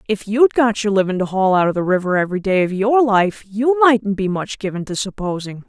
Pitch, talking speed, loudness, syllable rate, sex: 205 Hz, 245 wpm, -17 LUFS, 5.6 syllables/s, female